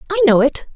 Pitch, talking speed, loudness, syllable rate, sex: 315 Hz, 240 wpm, -15 LUFS, 8.3 syllables/s, female